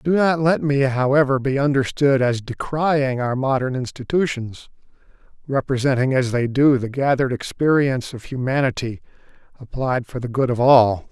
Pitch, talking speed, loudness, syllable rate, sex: 130 Hz, 145 wpm, -20 LUFS, 4.9 syllables/s, male